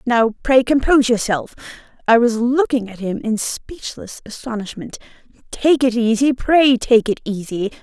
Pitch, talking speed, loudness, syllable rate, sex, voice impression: 240 Hz, 145 wpm, -17 LUFS, 3.0 syllables/s, female, feminine, adult-like, fluent, slightly intellectual, slightly sharp